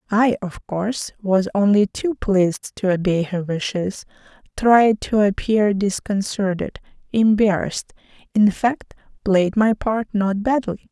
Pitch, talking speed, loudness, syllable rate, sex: 205 Hz, 125 wpm, -20 LUFS, 4.1 syllables/s, female